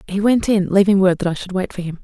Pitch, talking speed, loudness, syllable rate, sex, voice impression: 190 Hz, 325 wpm, -17 LUFS, 6.5 syllables/s, female, feminine, adult-like, slightly cool, slightly sincere, calm, slightly sweet